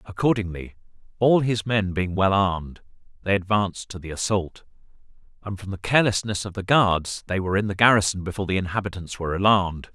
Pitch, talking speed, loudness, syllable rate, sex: 100 Hz, 175 wpm, -23 LUFS, 6.1 syllables/s, male